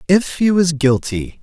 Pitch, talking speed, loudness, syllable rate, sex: 165 Hz, 170 wpm, -16 LUFS, 4.0 syllables/s, male